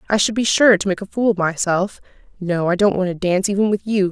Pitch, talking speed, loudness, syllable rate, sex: 195 Hz, 275 wpm, -18 LUFS, 6.2 syllables/s, female